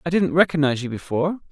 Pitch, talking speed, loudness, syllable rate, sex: 155 Hz, 200 wpm, -21 LUFS, 7.8 syllables/s, male